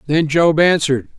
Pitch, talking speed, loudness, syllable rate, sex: 155 Hz, 150 wpm, -15 LUFS, 5.4 syllables/s, male